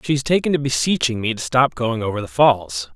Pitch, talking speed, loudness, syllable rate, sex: 120 Hz, 245 wpm, -19 LUFS, 5.7 syllables/s, male